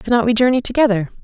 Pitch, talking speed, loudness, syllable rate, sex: 235 Hz, 195 wpm, -16 LUFS, 7.2 syllables/s, female